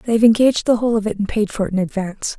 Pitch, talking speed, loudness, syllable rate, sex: 215 Hz, 325 wpm, -18 LUFS, 8.0 syllables/s, female